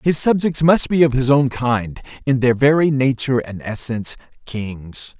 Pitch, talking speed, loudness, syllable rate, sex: 130 Hz, 175 wpm, -17 LUFS, 4.6 syllables/s, male